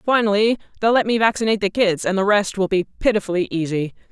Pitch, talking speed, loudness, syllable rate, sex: 205 Hz, 205 wpm, -19 LUFS, 6.4 syllables/s, female